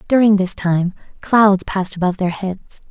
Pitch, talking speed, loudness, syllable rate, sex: 190 Hz, 165 wpm, -17 LUFS, 4.9 syllables/s, female